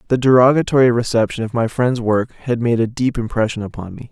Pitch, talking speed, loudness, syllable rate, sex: 120 Hz, 205 wpm, -17 LUFS, 6.2 syllables/s, male